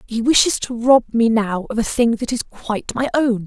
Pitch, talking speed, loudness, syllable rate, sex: 235 Hz, 245 wpm, -18 LUFS, 5.0 syllables/s, female